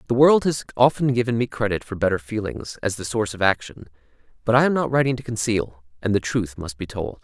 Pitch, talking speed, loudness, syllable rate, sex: 110 Hz, 230 wpm, -22 LUFS, 6.0 syllables/s, male